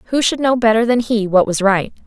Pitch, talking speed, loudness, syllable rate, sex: 225 Hz, 260 wpm, -15 LUFS, 5.8 syllables/s, female